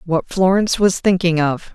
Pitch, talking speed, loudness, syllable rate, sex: 180 Hz, 170 wpm, -16 LUFS, 5.1 syllables/s, female